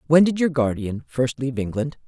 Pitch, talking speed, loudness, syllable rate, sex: 135 Hz, 205 wpm, -22 LUFS, 5.6 syllables/s, female